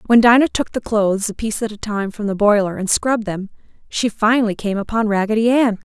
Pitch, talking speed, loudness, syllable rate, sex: 215 Hz, 225 wpm, -18 LUFS, 6.1 syllables/s, female